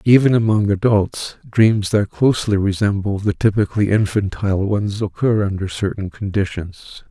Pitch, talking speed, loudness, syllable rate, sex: 100 Hz, 125 wpm, -18 LUFS, 4.8 syllables/s, male